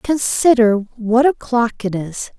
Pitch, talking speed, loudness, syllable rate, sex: 235 Hz, 125 wpm, -16 LUFS, 3.5 syllables/s, female